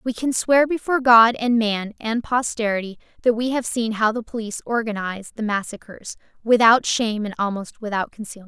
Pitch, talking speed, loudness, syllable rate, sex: 225 Hz, 175 wpm, -20 LUFS, 5.6 syllables/s, female